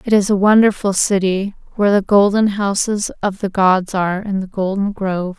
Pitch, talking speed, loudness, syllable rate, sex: 195 Hz, 190 wpm, -16 LUFS, 5.2 syllables/s, female